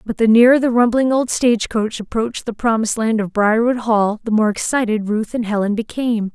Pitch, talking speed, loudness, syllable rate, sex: 225 Hz, 200 wpm, -17 LUFS, 5.6 syllables/s, female